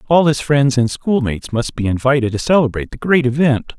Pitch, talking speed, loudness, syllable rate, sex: 130 Hz, 205 wpm, -16 LUFS, 5.9 syllables/s, male